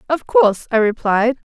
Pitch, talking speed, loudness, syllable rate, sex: 245 Hz, 160 wpm, -16 LUFS, 5.0 syllables/s, female